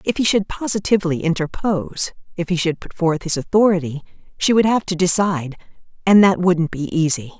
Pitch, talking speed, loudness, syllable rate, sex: 175 Hz, 180 wpm, -18 LUFS, 5.7 syllables/s, female